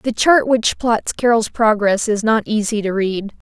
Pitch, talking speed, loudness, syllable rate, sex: 220 Hz, 190 wpm, -16 LUFS, 4.2 syllables/s, female